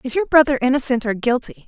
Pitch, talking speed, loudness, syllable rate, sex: 260 Hz, 215 wpm, -18 LUFS, 6.4 syllables/s, female